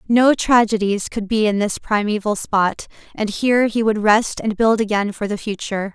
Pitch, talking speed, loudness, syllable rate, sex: 215 Hz, 190 wpm, -18 LUFS, 4.9 syllables/s, female